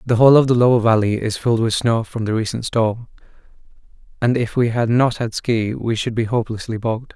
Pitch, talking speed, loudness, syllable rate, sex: 115 Hz, 220 wpm, -18 LUFS, 5.9 syllables/s, male